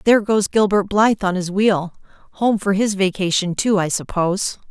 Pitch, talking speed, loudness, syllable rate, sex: 195 Hz, 180 wpm, -18 LUFS, 5.2 syllables/s, female